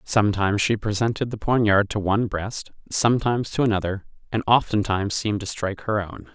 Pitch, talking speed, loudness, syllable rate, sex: 105 Hz, 170 wpm, -23 LUFS, 6.0 syllables/s, male